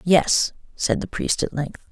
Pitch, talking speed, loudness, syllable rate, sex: 160 Hz, 190 wpm, -22 LUFS, 3.9 syllables/s, female